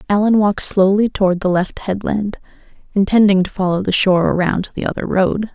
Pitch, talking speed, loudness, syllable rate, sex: 195 Hz, 185 wpm, -16 LUFS, 5.8 syllables/s, female